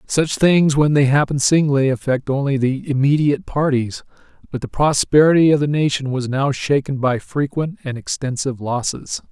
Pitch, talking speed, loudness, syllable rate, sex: 140 Hz, 160 wpm, -18 LUFS, 5.0 syllables/s, male